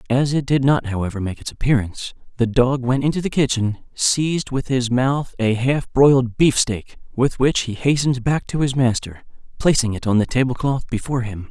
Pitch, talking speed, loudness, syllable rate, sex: 125 Hz, 200 wpm, -19 LUFS, 5.3 syllables/s, male